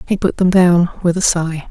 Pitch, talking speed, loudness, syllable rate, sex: 175 Hz, 245 wpm, -14 LUFS, 4.6 syllables/s, female